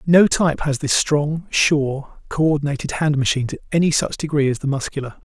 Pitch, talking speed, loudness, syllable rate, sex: 145 Hz, 180 wpm, -19 LUFS, 5.5 syllables/s, male